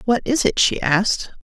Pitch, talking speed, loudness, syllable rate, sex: 210 Hz, 210 wpm, -18 LUFS, 4.9 syllables/s, female